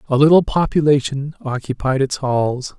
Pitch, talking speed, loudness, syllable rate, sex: 140 Hz, 130 wpm, -17 LUFS, 4.7 syllables/s, male